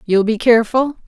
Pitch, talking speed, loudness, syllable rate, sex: 230 Hz, 165 wpm, -15 LUFS, 5.6 syllables/s, female